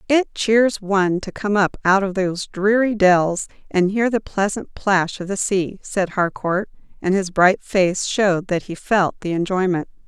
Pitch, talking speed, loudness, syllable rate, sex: 195 Hz, 185 wpm, -19 LUFS, 4.3 syllables/s, female